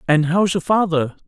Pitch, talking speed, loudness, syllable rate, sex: 170 Hz, 190 wpm, -18 LUFS, 4.9 syllables/s, male